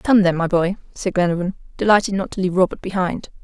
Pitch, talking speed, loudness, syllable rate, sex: 185 Hz, 210 wpm, -19 LUFS, 6.5 syllables/s, female